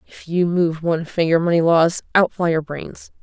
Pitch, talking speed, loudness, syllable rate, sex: 170 Hz, 185 wpm, -18 LUFS, 4.9 syllables/s, female